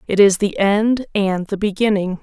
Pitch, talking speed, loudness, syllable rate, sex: 200 Hz, 190 wpm, -17 LUFS, 4.4 syllables/s, female